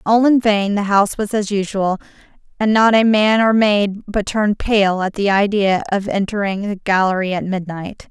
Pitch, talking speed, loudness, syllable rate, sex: 205 Hz, 190 wpm, -16 LUFS, 4.8 syllables/s, female